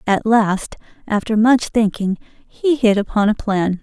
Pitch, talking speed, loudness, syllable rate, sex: 215 Hz, 155 wpm, -17 LUFS, 4.1 syllables/s, female